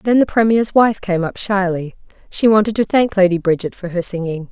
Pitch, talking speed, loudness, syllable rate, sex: 195 Hz, 215 wpm, -16 LUFS, 5.4 syllables/s, female